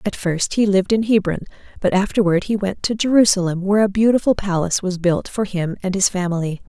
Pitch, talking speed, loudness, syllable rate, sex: 195 Hz, 205 wpm, -18 LUFS, 6.0 syllables/s, female